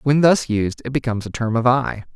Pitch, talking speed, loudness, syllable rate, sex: 125 Hz, 250 wpm, -19 LUFS, 5.7 syllables/s, male